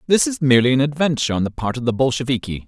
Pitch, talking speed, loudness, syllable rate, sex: 130 Hz, 245 wpm, -18 LUFS, 7.6 syllables/s, male